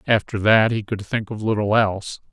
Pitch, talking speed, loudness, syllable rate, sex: 105 Hz, 205 wpm, -20 LUFS, 5.3 syllables/s, male